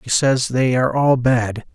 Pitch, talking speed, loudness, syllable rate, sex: 125 Hz, 205 wpm, -17 LUFS, 4.2 syllables/s, male